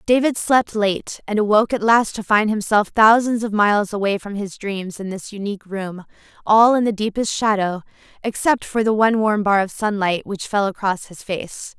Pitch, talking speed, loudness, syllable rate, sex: 210 Hz, 200 wpm, -19 LUFS, 5.0 syllables/s, female